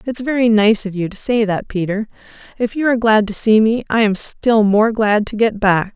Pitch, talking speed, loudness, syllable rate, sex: 215 Hz, 240 wpm, -16 LUFS, 5.1 syllables/s, female